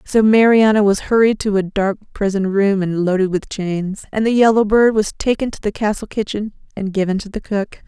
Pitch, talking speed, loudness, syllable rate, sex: 205 Hz, 215 wpm, -17 LUFS, 5.3 syllables/s, female